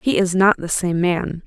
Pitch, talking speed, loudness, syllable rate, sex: 180 Hz, 245 wpm, -18 LUFS, 4.4 syllables/s, female